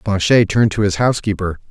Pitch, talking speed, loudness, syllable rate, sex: 105 Hz, 175 wpm, -16 LUFS, 6.5 syllables/s, male